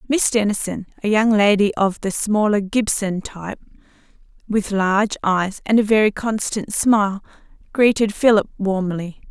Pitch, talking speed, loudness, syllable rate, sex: 205 Hz, 135 wpm, -19 LUFS, 4.6 syllables/s, female